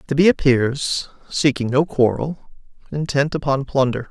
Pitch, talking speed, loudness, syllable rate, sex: 140 Hz, 130 wpm, -19 LUFS, 4.6 syllables/s, male